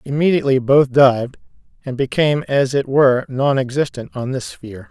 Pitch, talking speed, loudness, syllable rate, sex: 135 Hz, 145 wpm, -17 LUFS, 5.6 syllables/s, male